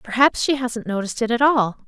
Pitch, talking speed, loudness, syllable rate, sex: 240 Hz, 225 wpm, -20 LUFS, 5.8 syllables/s, female